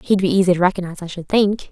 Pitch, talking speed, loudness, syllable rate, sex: 185 Hz, 280 wpm, -18 LUFS, 7.2 syllables/s, female